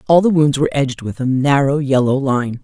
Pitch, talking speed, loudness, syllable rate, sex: 140 Hz, 225 wpm, -16 LUFS, 5.7 syllables/s, female